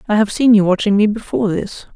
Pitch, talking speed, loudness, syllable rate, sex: 210 Hz, 245 wpm, -15 LUFS, 6.4 syllables/s, female